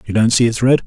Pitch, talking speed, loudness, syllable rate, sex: 115 Hz, 345 wpm, -14 LUFS, 7.3 syllables/s, male